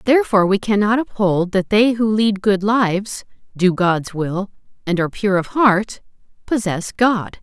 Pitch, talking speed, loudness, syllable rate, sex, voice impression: 205 Hz, 160 wpm, -17 LUFS, 4.6 syllables/s, female, very feminine, young, very thin, tensed, powerful, bright, slightly soft, clear, slightly muffled, halting, cute, slightly cool, intellectual, very refreshing, sincere, very calm, friendly, reassuring, unique, slightly elegant, slightly wild, sweet, lively, kind, slightly modest